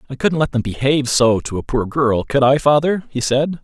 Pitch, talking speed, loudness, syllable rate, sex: 135 Hz, 230 wpm, -17 LUFS, 5.3 syllables/s, male